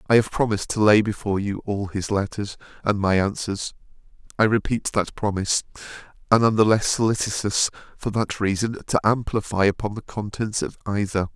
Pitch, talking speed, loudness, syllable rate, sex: 105 Hz, 170 wpm, -23 LUFS, 5.5 syllables/s, male